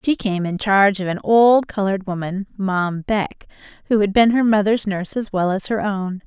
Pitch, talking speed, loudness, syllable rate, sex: 200 Hz, 210 wpm, -19 LUFS, 5.0 syllables/s, female